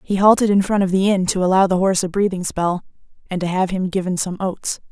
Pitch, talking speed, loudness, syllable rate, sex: 190 Hz, 255 wpm, -18 LUFS, 6.1 syllables/s, female